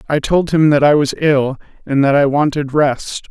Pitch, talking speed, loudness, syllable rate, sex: 145 Hz, 220 wpm, -14 LUFS, 4.6 syllables/s, male